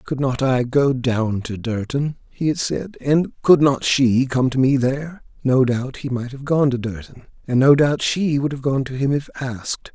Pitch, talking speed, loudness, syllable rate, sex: 135 Hz, 225 wpm, -20 LUFS, 4.4 syllables/s, male